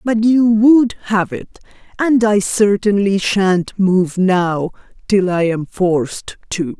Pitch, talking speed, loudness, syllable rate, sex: 200 Hz, 140 wpm, -15 LUFS, 3.3 syllables/s, female